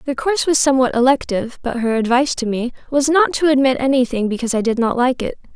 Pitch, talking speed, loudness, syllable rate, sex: 255 Hz, 225 wpm, -17 LUFS, 6.7 syllables/s, female